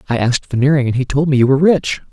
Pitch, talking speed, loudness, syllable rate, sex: 135 Hz, 285 wpm, -14 LUFS, 7.5 syllables/s, male